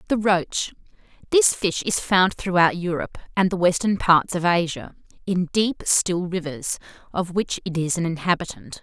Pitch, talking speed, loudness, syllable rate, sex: 180 Hz, 155 wpm, -22 LUFS, 4.7 syllables/s, female